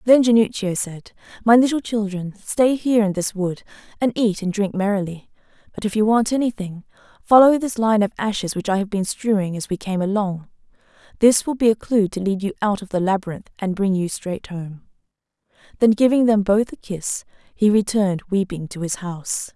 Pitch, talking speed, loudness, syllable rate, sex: 205 Hz, 195 wpm, -20 LUFS, 5.4 syllables/s, female